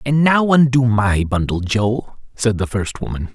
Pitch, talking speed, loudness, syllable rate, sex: 120 Hz, 180 wpm, -17 LUFS, 4.3 syllables/s, male